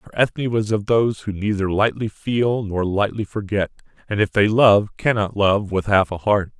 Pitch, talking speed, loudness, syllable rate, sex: 105 Hz, 200 wpm, -20 LUFS, 4.8 syllables/s, male